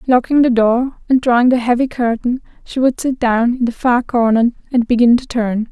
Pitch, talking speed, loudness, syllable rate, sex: 245 Hz, 210 wpm, -15 LUFS, 5.3 syllables/s, female